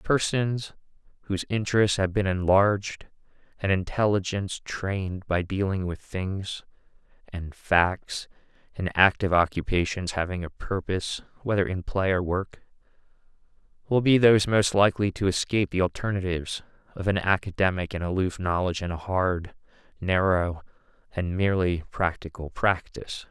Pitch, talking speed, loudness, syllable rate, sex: 95 Hz, 125 wpm, -26 LUFS, 4.9 syllables/s, male